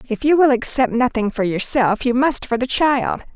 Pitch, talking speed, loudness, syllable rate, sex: 250 Hz, 215 wpm, -17 LUFS, 4.9 syllables/s, female